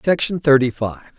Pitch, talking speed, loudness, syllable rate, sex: 140 Hz, 150 wpm, -18 LUFS, 5.5 syllables/s, male